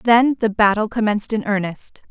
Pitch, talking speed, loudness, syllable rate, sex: 215 Hz, 170 wpm, -18 LUFS, 5.1 syllables/s, female